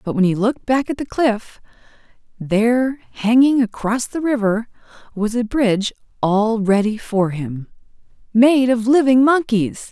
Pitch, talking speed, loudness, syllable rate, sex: 230 Hz, 140 wpm, -18 LUFS, 4.4 syllables/s, female